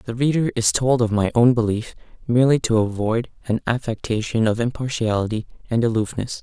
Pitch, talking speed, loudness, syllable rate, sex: 115 Hz, 160 wpm, -21 LUFS, 5.5 syllables/s, male